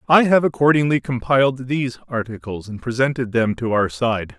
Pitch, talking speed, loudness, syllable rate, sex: 125 Hz, 165 wpm, -19 LUFS, 5.3 syllables/s, male